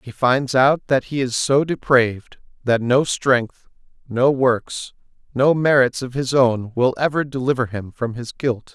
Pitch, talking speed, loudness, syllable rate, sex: 130 Hz, 170 wpm, -19 LUFS, 4.1 syllables/s, male